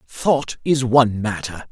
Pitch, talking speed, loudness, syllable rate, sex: 120 Hz, 140 wpm, -19 LUFS, 4.1 syllables/s, male